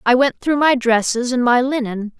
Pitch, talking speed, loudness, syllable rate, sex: 250 Hz, 220 wpm, -17 LUFS, 4.8 syllables/s, female